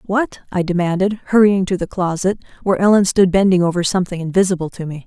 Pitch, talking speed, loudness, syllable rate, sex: 185 Hz, 190 wpm, -17 LUFS, 6.4 syllables/s, female